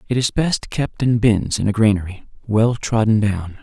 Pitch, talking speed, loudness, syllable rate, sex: 110 Hz, 200 wpm, -18 LUFS, 4.6 syllables/s, male